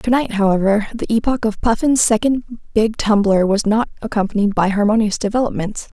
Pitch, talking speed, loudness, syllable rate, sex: 215 Hz, 160 wpm, -17 LUFS, 5.4 syllables/s, female